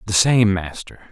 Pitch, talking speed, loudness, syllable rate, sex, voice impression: 100 Hz, 160 wpm, -17 LUFS, 4.2 syllables/s, male, very masculine, very middle-aged, thick, slightly tensed, weak, slightly bright, soft, muffled, fluent, slightly raspy, cool, very intellectual, slightly refreshing, sincere, calm, mature, very friendly, reassuring, unique, very elegant, wild, slightly sweet, lively, kind, slightly modest